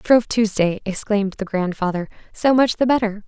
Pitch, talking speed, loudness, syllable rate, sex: 210 Hz, 165 wpm, -19 LUFS, 5.7 syllables/s, female